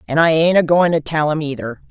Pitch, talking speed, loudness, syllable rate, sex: 155 Hz, 285 wpm, -16 LUFS, 5.9 syllables/s, female